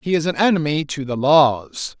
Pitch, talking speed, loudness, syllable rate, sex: 150 Hz, 210 wpm, -18 LUFS, 4.8 syllables/s, male